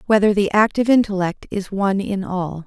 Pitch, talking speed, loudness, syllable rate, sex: 200 Hz, 180 wpm, -19 LUFS, 5.7 syllables/s, female